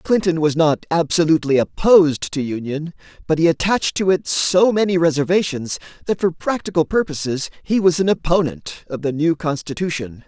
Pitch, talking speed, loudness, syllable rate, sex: 160 Hz, 160 wpm, -18 LUFS, 5.3 syllables/s, male